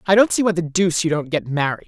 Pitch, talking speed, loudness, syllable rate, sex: 170 Hz, 320 wpm, -19 LUFS, 7.1 syllables/s, female